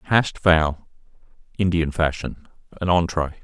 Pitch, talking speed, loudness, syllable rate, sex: 85 Hz, 105 wpm, -21 LUFS, 4.1 syllables/s, male